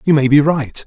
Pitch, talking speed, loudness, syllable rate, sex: 145 Hz, 280 wpm, -14 LUFS, 5.2 syllables/s, male